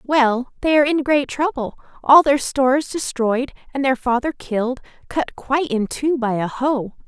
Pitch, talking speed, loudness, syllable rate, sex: 265 Hz, 170 wpm, -19 LUFS, 4.7 syllables/s, female